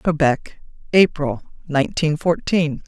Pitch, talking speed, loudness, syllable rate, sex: 155 Hz, 85 wpm, -19 LUFS, 4.0 syllables/s, female